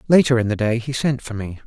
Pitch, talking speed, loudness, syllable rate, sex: 120 Hz, 290 wpm, -20 LUFS, 6.1 syllables/s, male